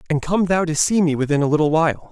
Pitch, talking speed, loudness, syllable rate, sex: 160 Hz, 285 wpm, -18 LUFS, 6.8 syllables/s, male